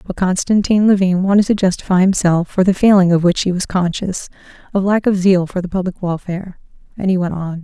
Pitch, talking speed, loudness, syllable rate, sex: 185 Hz, 210 wpm, -15 LUFS, 5.9 syllables/s, female